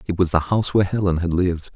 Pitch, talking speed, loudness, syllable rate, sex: 90 Hz, 275 wpm, -20 LUFS, 7.5 syllables/s, male